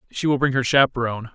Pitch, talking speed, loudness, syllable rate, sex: 125 Hz, 225 wpm, -20 LUFS, 7.1 syllables/s, male